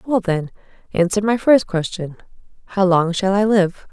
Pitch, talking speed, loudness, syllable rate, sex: 195 Hz, 170 wpm, -18 LUFS, 4.5 syllables/s, female